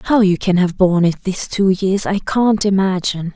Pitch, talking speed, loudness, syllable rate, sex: 190 Hz, 215 wpm, -16 LUFS, 4.8 syllables/s, female